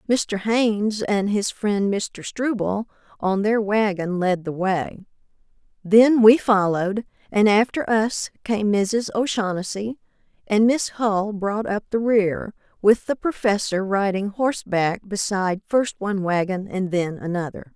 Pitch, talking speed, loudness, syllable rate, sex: 205 Hz, 140 wpm, -21 LUFS, 4.1 syllables/s, female